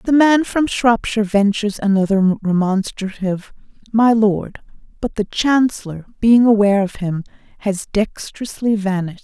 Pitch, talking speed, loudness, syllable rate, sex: 210 Hz, 125 wpm, -17 LUFS, 4.9 syllables/s, female